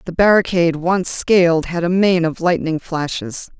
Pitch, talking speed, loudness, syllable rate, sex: 175 Hz, 165 wpm, -16 LUFS, 4.7 syllables/s, female